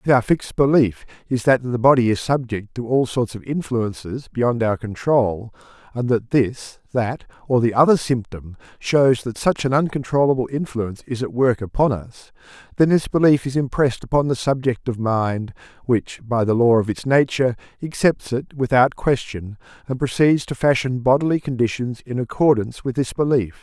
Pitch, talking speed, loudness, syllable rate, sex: 125 Hz, 175 wpm, -20 LUFS, 5.1 syllables/s, male